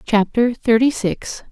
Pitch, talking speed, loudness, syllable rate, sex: 230 Hz, 120 wpm, -18 LUFS, 3.8 syllables/s, female